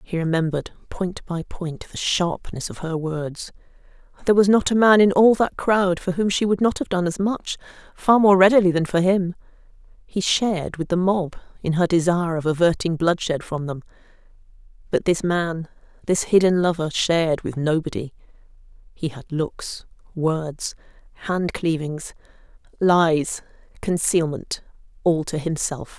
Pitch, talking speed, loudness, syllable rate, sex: 175 Hz, 150 wpm, -21 LUFS, 4.7 syllables/s, female